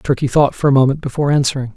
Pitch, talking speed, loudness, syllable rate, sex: 135 Hz, 240 wpm, -15 LUFS, 7.6 syllables/s, male